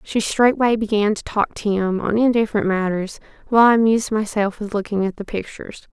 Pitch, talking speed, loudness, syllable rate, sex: 210 Hz, 190 wpm, -19 LUFS, 5.8 syllables/s, female